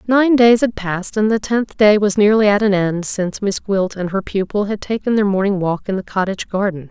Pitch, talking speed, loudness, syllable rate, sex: 200 Hz, 245 wpm, -17 LUFS, 5.5 syllables/s, female